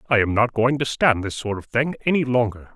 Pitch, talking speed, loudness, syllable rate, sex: 120 Hz, 260 wpm, -21 LUFS, 5.8 syllables/s, male